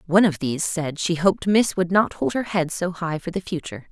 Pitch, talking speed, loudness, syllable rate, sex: 175 Hz, 260 wpm, -22 LUFS, 5.9 syllables/s, female